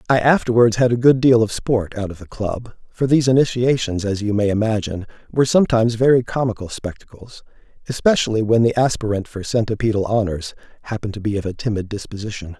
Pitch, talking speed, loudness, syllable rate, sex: 110 Hz, 180 wpm, -19 LUFS, 6.3 syllables/s, male